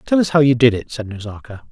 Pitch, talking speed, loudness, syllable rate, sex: 125 Hz, 280 wpm, -15 LUFS, 6.3 syllables/s, male